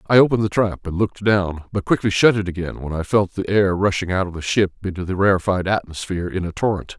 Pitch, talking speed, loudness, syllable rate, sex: 95 Hz, 250 wpm, -20 LUFS, 6.4 syllables/s, male